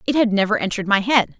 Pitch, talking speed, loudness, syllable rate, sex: 215 Hz, 260 wpm, -18 LUFS, 7.1 syllables/s, female